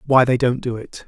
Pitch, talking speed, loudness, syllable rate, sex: 125 Hz, 280 wpm, -18 LUFS, 5.4 syllables/s, male